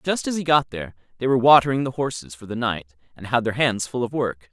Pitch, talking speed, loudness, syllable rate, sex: 125 Hz, 265 wpm, -21 LUFS, 6.4 syllables/s, male